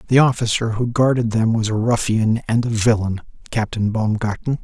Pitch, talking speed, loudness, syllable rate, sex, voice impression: 115 Hz, 170 wpm, -19 LUFS, 5.1 syllables/s, male, masculine, slightly young, slightly adult-like, slightly thick, slightly relaxed, slightly powerful, slightly bright, slightly soft, clear, fluent, slightly cool, intellectual, slightly refreshing, very sincere, very calm, slightly mature, friendly, reassuring, slightly unique, slightly wild, slightly sweet, kind, very modest